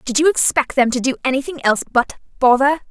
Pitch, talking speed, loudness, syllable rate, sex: 265 Hz, 230 wpm, -17 LUFS, 6.5 syllables/s, female